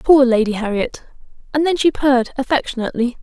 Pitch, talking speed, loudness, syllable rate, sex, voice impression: 260 Hz, 150 wpm, -17 LUFS, 6.2 syllables/s, female, feminine, slightly adult-like, clear, slightly fluent, friendly, lively